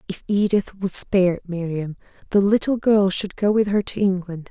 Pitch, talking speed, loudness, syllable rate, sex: 190 Hz, 185 wpm, -20 LUFS, 4.9 syllables/s, female